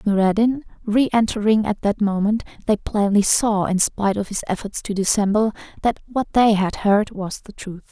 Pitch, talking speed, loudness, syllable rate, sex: 210 Hz, 180 wpm, -20 LUFS, 5.0 syllables/s, female